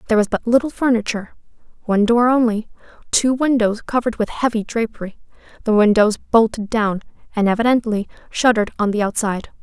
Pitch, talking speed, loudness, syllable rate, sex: 225 Hz, 150 wpm, -18 LUFS, 6.3 syllables/s, female